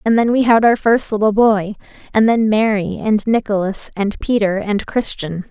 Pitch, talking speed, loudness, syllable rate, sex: 215 Hz, 185 wpm, -16 LUFS, 4.7 syllables/s, female